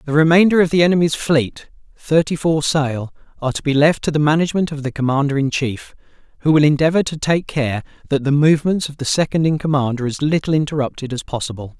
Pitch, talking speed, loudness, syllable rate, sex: 150 Hz, 210 wpm, -17 LUFS, 6.3 syllables/s, male